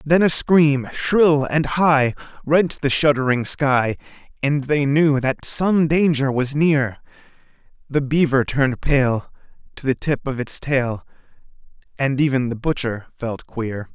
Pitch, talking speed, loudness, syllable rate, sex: 140 Hz, 145 wpm, -19 LUFS, 3.9 syllables/s, male